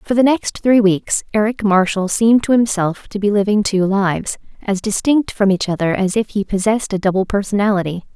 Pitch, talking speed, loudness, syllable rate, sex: 205 Hz, 200 wpm, -16 LUFS, 5.5 syllables/s, female